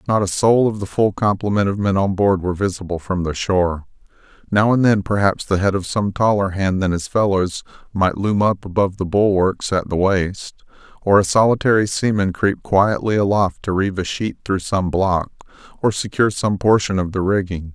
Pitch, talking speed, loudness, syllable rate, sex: 100 Hz, 200 wpm, -18 LUFS, 5.2 syllables/s, male